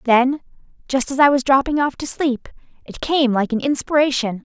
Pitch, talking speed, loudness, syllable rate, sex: 265 Hz, 185 wpm, -18 LUFS, 5.1 syllables/s, female